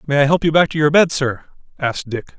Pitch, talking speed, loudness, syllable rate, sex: 145 Hz, 275 wpm, -17 LUFS, 6.3 syllables/s, male